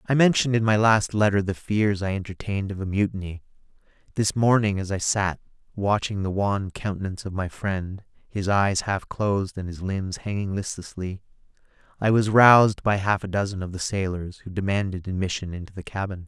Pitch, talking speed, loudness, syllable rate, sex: 100 Hz, 175 wpm, -24 LUFS, 5.4 syllables/s, male